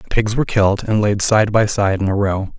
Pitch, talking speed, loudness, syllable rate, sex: 105 Hz, 280 wpm, -16 LUFS, 5.6 syllables/s, male